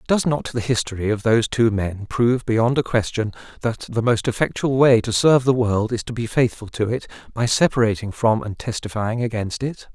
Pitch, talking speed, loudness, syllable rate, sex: 115 Hz, 205 wpm, -20 LUFS, 5.4 syllables/s, male